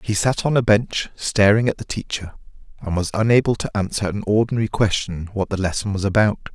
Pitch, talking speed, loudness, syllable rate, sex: 105 Hz, 200 wpm, -20 LUFS, 5.7 syllables/s, male